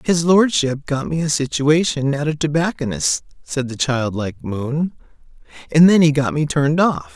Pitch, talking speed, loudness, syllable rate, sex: 140 Hz, 175 wpm, -18 LUFS, 4.6 syllables/s, male